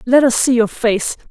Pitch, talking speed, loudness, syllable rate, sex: 240 Hz, 230 wpm, -15 LUFS, 4.6 syllables/s, female